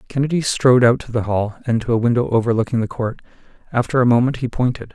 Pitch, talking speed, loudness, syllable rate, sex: 120 Hz, 220 wpm, -18 LUFS, 6.8 syllables/s, male